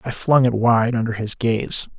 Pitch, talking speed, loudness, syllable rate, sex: 115 Hz, 210 wpm, -19 LUFS, 4.5 syllables/s, male